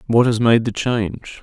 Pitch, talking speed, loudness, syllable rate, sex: 115 Hz, 210 wpm, -18 LUFS, 4.7 syllables/s, male